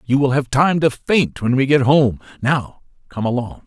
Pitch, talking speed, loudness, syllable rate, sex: 135 Hz, 215 wpm, -17 LUFS, 4.6 syllables/s, male